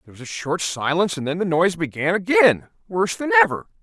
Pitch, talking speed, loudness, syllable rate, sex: 185 Hz, 220 wpm, -20 LUFS, 6.7 syllables/s, male